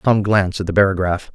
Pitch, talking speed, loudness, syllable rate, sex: 95 Hz, 225 wpm, -17 LUFS, 6.4 syllables/s, male